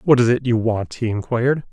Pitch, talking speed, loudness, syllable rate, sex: 120 Hz, 245 wpm, -19 LUFS, 5.6 syllables/s, male